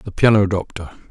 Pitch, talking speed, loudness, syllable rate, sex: 100 Hz, 165 wpm, -17 LUFS, 5.3 syllables/s, male